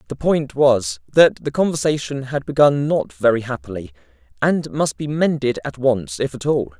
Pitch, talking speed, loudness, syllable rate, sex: 125 Hz, 175 wpm, -19 LUFS, 4.7 syllables/s, male